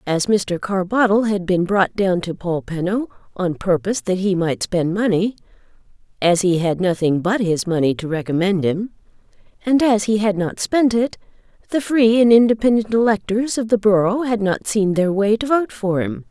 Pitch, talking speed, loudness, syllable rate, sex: 200 Hz, 175 wpm, -18 LUFS, 4.8 syllables/s, female